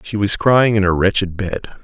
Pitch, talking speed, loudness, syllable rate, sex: 100 Hz, 230 wpm, -16 LUFS, 5.0 syllables/s, male